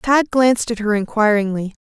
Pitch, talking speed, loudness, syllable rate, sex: 225 Hz, 165 wpm, -17 LUFS, 5.3 syllables/s, female